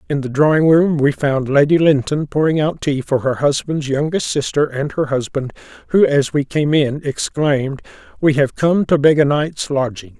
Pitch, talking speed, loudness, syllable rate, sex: 145 Hz, 195 wpm, -16 LUFS, 4.8 syllables/s, male